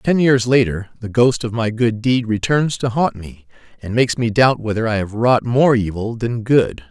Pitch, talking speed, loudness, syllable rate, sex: 115 Hz, 215 wpm, -17 LUFS, 4.7 syllables/s, male